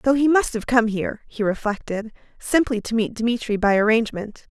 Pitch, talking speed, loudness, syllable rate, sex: 225 Hz, 185 wpm, -21 LUFS, 5.3 syllables/s, female